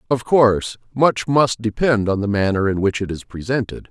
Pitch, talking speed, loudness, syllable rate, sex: 110 Hz, 200 wpm, -18 LUFS, 5.1 syllables/s, male